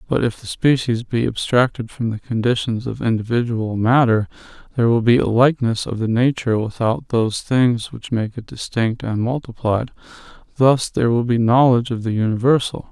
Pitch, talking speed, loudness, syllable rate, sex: 120 Hz, 170 wpm, -19 LUFS, 5.4 syllables/s, male